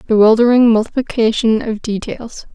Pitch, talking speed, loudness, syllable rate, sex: 225 Hz, 95 wpm, -14 LUFS, 5.1 syllables/s, female